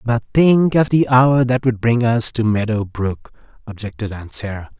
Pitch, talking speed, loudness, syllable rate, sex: 115 Hz, 190 wpm, -17 LUFS, 4.6 syllables/s, male